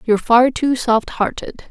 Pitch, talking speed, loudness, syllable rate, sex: 240 Hz, 140 wpm, -16 LUFS, 4.4 syllables/s, female